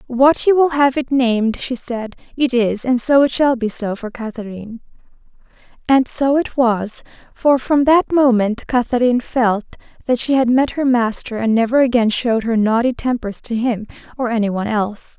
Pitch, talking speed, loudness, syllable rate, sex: 245 Hz, 180 wpm, -17 LUFS, 4.9 syllables/s, female